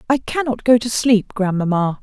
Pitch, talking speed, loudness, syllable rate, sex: 225 Hz, 180 wpm, -17 LUFS, 4.4 syllables/s, female